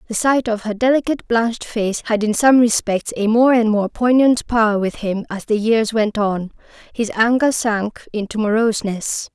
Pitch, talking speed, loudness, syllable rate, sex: 225 Hz, 185 wpm, -17 LUFS, 4.8 syllables/s, female